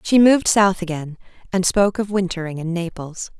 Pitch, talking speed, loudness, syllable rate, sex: 185 Hz, 175 wpm, -19 LUFS, 5.5 syllables/s, female